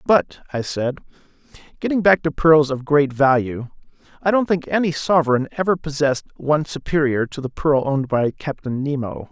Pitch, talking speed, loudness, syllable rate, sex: 145 Hz, 165 wpm, -20 LUFS, 5.2 syllables/s, male